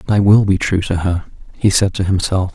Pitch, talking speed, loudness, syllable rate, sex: 95 Hz, 260 wpm, -15 LUFS, 5.7 syllables/s, male